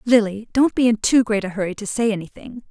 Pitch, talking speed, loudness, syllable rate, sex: 220 Hz, 245 wpm, -19 LUFS, 5.6 syllables/s, female